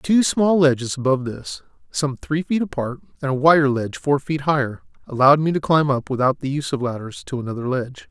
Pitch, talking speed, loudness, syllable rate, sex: 140 Hz, 215 wpm, -20 LUFS, 6.0 syllables/s, male